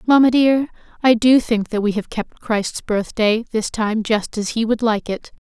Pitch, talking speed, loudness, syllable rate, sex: 225 Hz, 210 wpm, -18 LUFS, 4.4 syllables/s, female